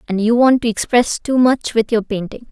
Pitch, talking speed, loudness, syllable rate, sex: 230 Hz, 240 wpm, -16 LUFS, 5.1 syllables/s, female